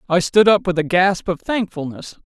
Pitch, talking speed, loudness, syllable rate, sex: 180 Hz, 210 wpm, -17 LUFS, 4.9 syllables/s, male